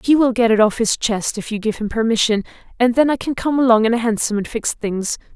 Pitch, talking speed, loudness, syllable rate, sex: 230 Hz, 270 wpm, -18 LUFS, 5.9 syllables/s, female